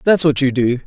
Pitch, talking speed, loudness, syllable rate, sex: 140 Hz, 280 wpm, -16 LUFS, 5.6 syllables/s, male